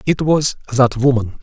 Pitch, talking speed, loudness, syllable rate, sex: 130 Hz, 170 wpm, -16 LUFS, 4.5 syllables/s, male